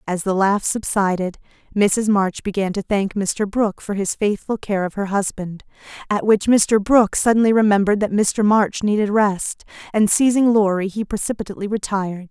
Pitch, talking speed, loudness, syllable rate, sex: 205 Hz, 170 wpm, -19 LUFS, 5.1 syllables/s, female